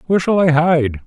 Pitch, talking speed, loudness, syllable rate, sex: 155 Hz, 225 wpm, -15 LUFS, 5.6 syllables/s, male